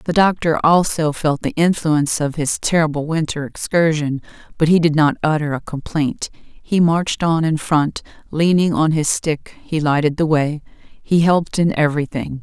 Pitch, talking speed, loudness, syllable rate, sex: 155 Hz, 170 wpm, -18 LUFS, 4.7 syllables/s, female